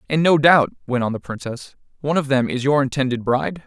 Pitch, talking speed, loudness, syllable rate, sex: 135 Hz, 230 wpm, -19 LUFS, 6.2 syllables/s, male